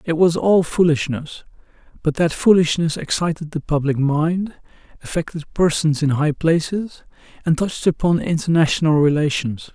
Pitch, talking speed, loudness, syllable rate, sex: 160 Hz, 130 wpm, -19 LUFS, 4.9 syllables/s, male